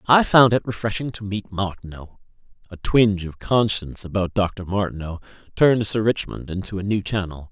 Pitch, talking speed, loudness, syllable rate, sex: 100 Hz, 170 wpm, -21 LUFS, 5.4 syllables/s, male